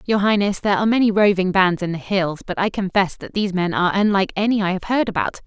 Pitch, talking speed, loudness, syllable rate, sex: 195 Hz, 250 wpm, -19 LUFS, 7.0 syllables/s, female